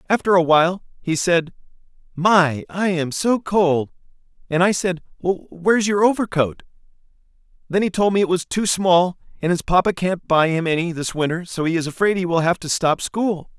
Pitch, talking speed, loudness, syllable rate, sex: 175 Hz, 185 wpm, -19 LUFS, 5.0 syllables/s, male